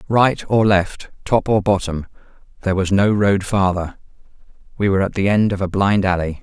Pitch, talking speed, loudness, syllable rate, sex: 100 Hz, 185 wpm, -18 LUFS, 5.2 syllables/s, male